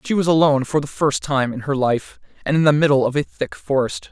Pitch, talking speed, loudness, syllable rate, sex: 140 Hz, 260 wpm, -19 LUFS, 5.9 syllables/s, male